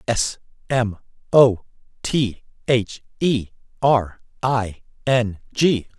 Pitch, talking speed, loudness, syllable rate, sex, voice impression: 120 Hz, 100 wpm, -21 LUFS, 2.9 syllables/s, male, very masculine, very adult-like, slightly thick, slightly muffled, sincere, slightly friendly